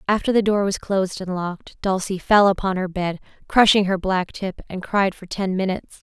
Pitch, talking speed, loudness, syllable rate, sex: 190 Hz, 205 wpm, -21 LUFS, 5.3 syllables/s, female